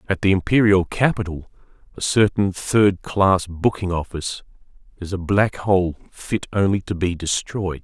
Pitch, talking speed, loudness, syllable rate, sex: 95 Hz, 145 wpm, -20 LUFS, 4.5 syllables/s, male